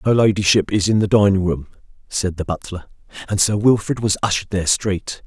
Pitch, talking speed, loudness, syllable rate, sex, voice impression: 100 Hz, 195 wpm, -18 LUFS, 5.9 syllables/s, male, masculine, very adult-like, sincere, slightly mature, elegant, slightly sweet